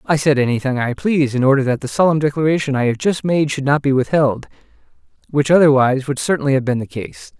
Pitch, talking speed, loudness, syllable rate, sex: 140 Hz, 220 wpm, -16 LUFS, 6.4 syllables/s, male